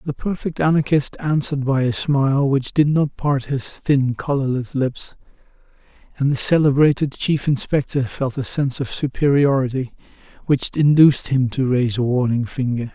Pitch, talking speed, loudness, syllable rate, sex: 135 Hz, 155 wpm, -19 LUFS, 5.0 syllables/s, male